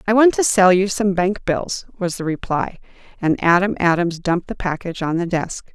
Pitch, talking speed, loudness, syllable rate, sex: 185 Hz, 210 wpm, -19 LUFS, 5.1 syllables/s, female